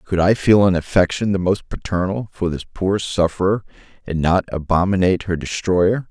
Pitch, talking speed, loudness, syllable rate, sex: 90 Hz, 165 wpm, -19 LUFS, 5.1 syllables/s, male